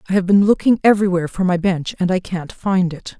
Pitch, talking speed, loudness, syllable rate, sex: 185 Hz, 245 wpm, -17 LUFS, 6.2 syllables/s, female